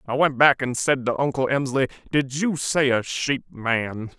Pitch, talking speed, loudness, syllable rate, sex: 135 Hz, 200 wpm, -22 LUFS, 4.3 syllables/s, male